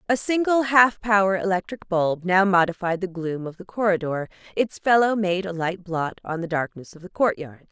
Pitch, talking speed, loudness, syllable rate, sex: 190 Hz, 195 wpm, -22 LUFS, 5.0 syllables/s, female